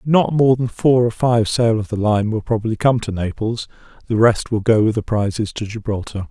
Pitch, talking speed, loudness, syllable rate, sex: 110 Hz, 230 wpm, -18 LUFS, 5.2 syllables/s, male